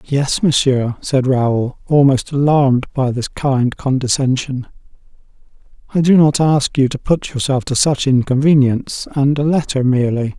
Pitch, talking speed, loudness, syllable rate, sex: 135 Hz, 145 wpm, -15 LUFS, 4.5 syllables/s, male